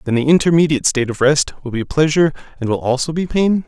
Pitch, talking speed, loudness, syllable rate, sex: 145 Hz, 230 wpm, -16 LUFS, 6.9 syllables/s, male